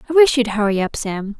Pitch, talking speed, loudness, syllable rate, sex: 235 Hz, 260 wpm, -17 LUFS, 5.9 syllables/s, female